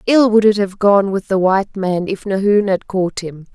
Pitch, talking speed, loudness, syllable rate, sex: 195 Hz, 235 wpm, -15 LUFS, 4.8 syllables/s, female